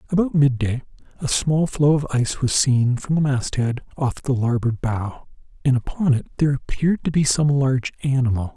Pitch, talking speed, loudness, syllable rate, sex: 135 Hz, 180 wpm, -21 LUFS, 5.2 syllables/s, male